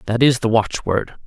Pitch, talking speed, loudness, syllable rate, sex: 115 Hz, 240 wpm, -18 LUFS, 5.1 syllables/s, female